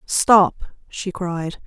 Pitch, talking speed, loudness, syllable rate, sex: 185 Hz, 110 wpm, -19 LUFS, 2.2 syllables/s, female